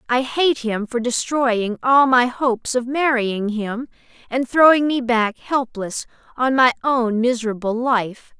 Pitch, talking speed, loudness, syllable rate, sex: 245 Hz, 150 wpm, -19 LUFS, 4.0 syllables/s, female